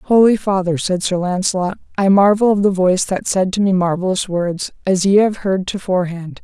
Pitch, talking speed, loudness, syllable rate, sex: 190 Hz, 205 wpm, -16 LUFS, 5.3 syllables/s, female